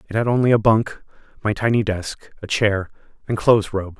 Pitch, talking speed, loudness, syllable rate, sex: 105 Hz, 195 wpm, -19 LUFS, 5.5 syllables/s, male